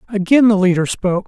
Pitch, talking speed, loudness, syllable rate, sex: 200 Hz, 190 wpm, -14 LUFS, 6.1 syllables/s, male